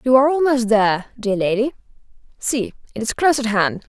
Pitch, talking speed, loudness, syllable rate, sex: 240 Hz, 165 wpm, -19 LUFS, 6.0 syllables/s, female